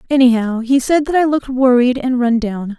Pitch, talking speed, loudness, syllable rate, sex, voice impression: 250 Hz, 215 wpm, -15 LUFS, 5.4 syllables/s, female, feminine, adult-like, slightly soft, calm, sweet, slightly kind